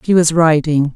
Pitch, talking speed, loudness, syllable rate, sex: 160 Hz, 190 wpm, -13 LUFS, 4.7 syllables/s, female